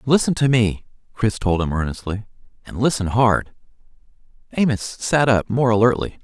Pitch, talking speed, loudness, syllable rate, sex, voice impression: 110 Hz, 155 wpm, -19 LUFS, 5.2 syllables/s, male, masculine, slightly adult-like, fluent, cool, calm